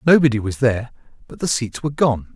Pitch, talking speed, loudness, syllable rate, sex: 125 Hz, 205 wpm, -19 LUFS, 6.4 syllables/s, male